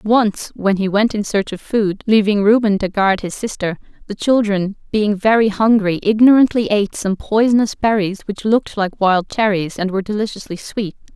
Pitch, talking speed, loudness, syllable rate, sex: 205 Hz, 180 wpm, -16 LUFS, 5.0 syllables/s, female